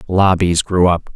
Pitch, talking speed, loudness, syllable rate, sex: 90 Hz, 155 wpm, -14 LUFS, 4.0 syllables/s, male